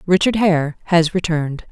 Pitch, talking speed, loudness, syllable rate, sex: 170 Hz, 140 wpm, -17 LUFS, 4.9 syllables/s, female